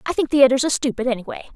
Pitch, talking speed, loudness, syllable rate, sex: 255 Hz, 230 wpm, -19 LUFS, 7.9 syllables/s, female